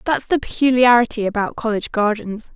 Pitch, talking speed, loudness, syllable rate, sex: 230 Hz, 140 wpm, -18 LUFS, 5.8 syllables/s, female